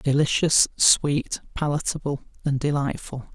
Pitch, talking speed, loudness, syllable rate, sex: 145 Hz, 90 wpm, -22 LUFS, 4.2 syllables/s, male